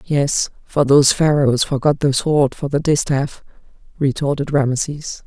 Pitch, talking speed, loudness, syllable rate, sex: 140 Hz, 135 wpm, -17 LUFS, 4.4 syllables/s, female